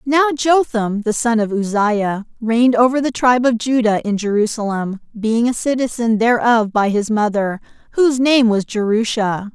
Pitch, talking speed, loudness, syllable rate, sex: 230 Hz, 155 wpm, -16 LUFS, 4.7 syllables/s, female